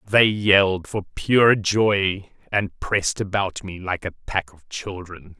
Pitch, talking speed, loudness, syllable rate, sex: 95 Hz, 155 wpm, -21 LUFS, 3.8 syllables/s, male